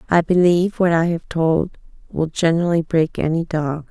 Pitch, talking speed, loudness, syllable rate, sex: 165 Hz, 170 wpm, -18 LUFS, 5.1 syllables/s, female